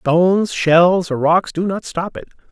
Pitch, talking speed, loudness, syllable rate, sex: 175 Hz, 190 wpm, -16 LUFS, 4.0 syllables/s, male